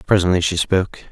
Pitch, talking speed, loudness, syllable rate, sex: 90 Hz, 160 wpm, -18 LUFS, 6.5 syllables/s, male